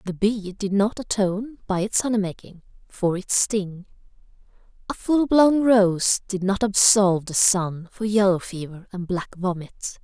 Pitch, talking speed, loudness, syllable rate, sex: 200 Hz, 160 wpm, -21 LUFS, 4.3 syllables/s, female